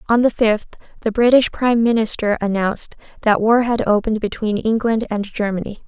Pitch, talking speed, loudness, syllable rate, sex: 220 Hz, 165 wpm, -18 LUFS, 5.6 syllables/s, female